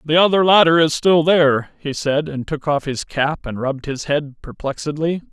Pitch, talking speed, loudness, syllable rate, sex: 150 Hz, 205 wpm, -18 LUFS, 5.0 syllables/s, male